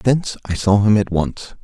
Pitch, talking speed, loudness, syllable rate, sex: 105 Hz, 220 wpm, -18 LUFS, 5.0 syllables/s, male